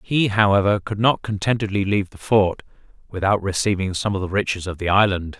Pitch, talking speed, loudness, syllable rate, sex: 100 Hz, 190 wpm, -20 LUFS, 5.8 syllables/s, male